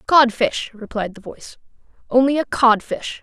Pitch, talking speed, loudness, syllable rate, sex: 240 Hz, 150 wpm, -18 LUFS, 4.9 syllables/s, female